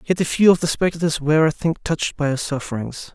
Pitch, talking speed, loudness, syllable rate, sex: 160 Hz, 250 wpm, -20 LUFS, 6.3 syllables/s, male